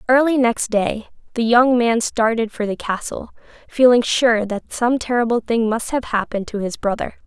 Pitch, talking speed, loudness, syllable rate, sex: 230 Hz, 180 wpm, -18 LUFS, 4.9 syllables/s, female